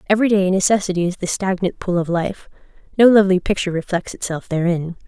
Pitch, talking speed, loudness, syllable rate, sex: 185 Hz, 155 wpm, -18 LUFS, 6.4 syllables/s, female